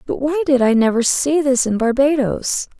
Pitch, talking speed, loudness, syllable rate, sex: 265 Hz, 195 wpm, -16 LUFS, 4.7 syllables/s, female